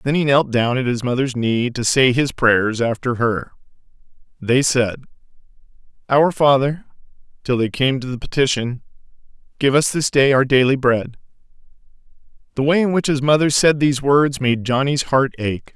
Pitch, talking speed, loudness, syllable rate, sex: 130 Hz, 170 wpm, -17 LUFS, 4.9 syllables/s, male